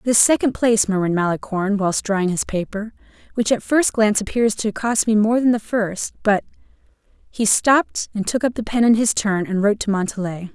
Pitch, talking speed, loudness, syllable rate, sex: 210 Hz, 200 wpm, -19 LUFS, 5.4 syllables/s, female